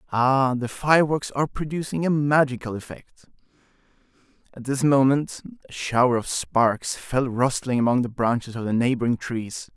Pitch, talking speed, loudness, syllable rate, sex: 130 Hz, 150 wpm, -23 LUFS, 4.9 syllables/s, male